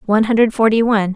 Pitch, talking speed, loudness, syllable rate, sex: 220 Hz, 205 wpm, -14 LUFS, 7.2 syllables/s, female